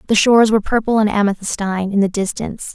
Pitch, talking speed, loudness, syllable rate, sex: 210 Hz, 195 wpm, -16 LUFS, 7.1 syllables/s, female